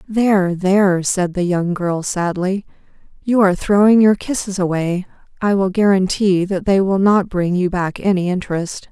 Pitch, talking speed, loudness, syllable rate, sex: 190 Hz, 170 wpm, -17 LUFS, 4.7 syllables/s, female